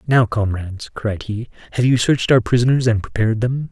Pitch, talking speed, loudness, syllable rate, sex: 115 Hz, 195 wpm, -18 LUFS, 5.9 syllables/s, male